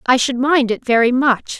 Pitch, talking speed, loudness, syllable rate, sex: 255 Hz, 225 wpm, -15 LUFS, 4.8 syllables/s, female